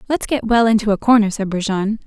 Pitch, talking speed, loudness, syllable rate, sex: 215 Hz, 230 wpm, -17 LUFS, 5.9 syllables/s, female